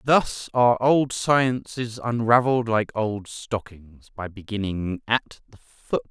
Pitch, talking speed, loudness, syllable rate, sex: 115 Hz, 130 wpm, -23 LUFS, 3.7 syllables/s, male